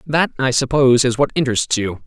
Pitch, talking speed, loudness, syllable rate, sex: 130 Hz, 205 wpm, -17 LUFS, 6.1 syllables/s, male